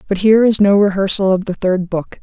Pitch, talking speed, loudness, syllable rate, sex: 195 Hz, 245 wpm, -14 LUFS, 5.8 syllables/s, female